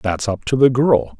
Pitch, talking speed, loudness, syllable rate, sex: 120 Hz, 250 wpm, -16 LUFS, 4.4 syllables/s, male